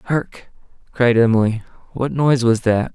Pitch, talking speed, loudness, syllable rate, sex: 120 Hz, 140 wpm, -17 LUFS, 4.9 syllables/s, male